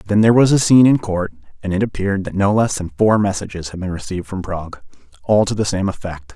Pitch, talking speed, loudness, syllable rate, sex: 100 Hz, 245 wpm, -17 LUFS, 6.5 syllables/s, male